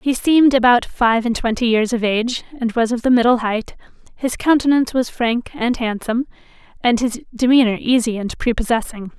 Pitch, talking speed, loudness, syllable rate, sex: 240 Hz, 175 wpm, -17 LUFS, 5.5 syllables/s, female